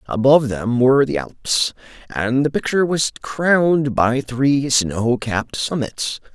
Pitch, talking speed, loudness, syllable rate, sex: 130 Hz, 140 wpm, -18 LUFS, 4.1 syllables/s, male